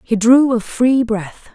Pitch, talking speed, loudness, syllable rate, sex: 235 Hz, 195 wpm, -15 LUFS, 3.6 syllables/s, female